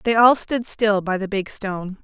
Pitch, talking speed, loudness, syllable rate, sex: 210 Hz, 235 wpm, -20 LUFS, 4.8 syllables/s, female